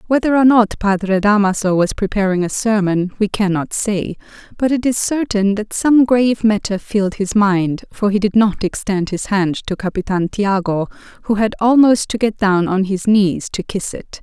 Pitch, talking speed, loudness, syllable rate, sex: 205 Hz, 190 wpm, -16 LUFS, 4.7 syllables/s, female